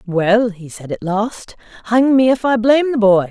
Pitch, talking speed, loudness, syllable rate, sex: 220 Hz, 220 wpm, -15 LUFS, 4.6 syllables/s, female